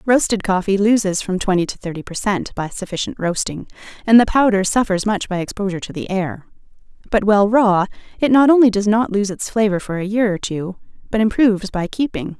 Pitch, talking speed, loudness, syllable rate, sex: 200 Hz, 205 wpm, -18 LUFS, 5.7 syllables/s, female